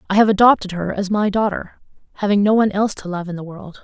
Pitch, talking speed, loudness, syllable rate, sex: 200 Hz, 250 wpm, -18 LUFS, 6.8 syllables/s, female